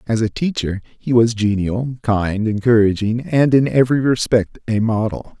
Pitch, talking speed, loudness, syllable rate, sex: 115 Hz, 155 wpm, -17 LUFS, 4.6 syllables/s, male